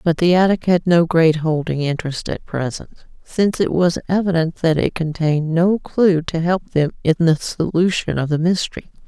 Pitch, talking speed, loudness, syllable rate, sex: 170 Hz, 185 wpm, -18 LUFS, 5.1 syllables/s, female